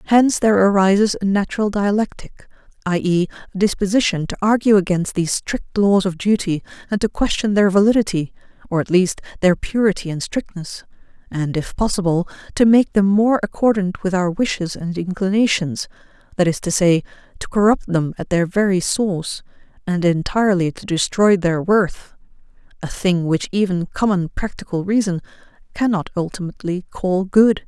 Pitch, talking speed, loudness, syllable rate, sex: 190 Hz, 155 wpm, -18 LUFS, 5.2 syllables/s, female